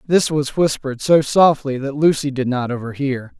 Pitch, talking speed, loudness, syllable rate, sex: 140 Hz, 175 wpm, -18 LUFS, 4.9 syllables/s, male